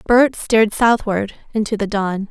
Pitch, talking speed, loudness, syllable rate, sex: 215 Hz, 155 wpm, -17 LUFS, 4.5 syllables/s, female